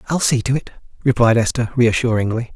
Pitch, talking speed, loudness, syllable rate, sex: 120 Hz, 165 wpm, -17 LUFS, 5.8 syllables/s, male